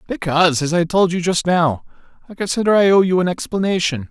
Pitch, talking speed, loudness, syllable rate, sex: 175 Hz, 205 wpm, -17 LUFS, 6.0 syllables/s, male